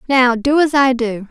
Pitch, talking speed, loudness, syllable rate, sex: 255 Hz, 230 wpm, -14 LUFS, 4.4 syllables/s, female